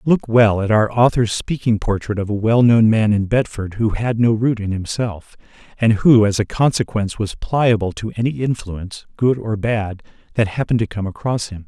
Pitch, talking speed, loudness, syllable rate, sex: 110 Hz, 195 wpm, -18 LUFS, 5.0 syllables/s, male